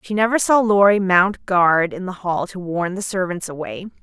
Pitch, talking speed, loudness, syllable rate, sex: 190 Hz, 210 wpm, -18 LUFS, 4.8 syllables/s, female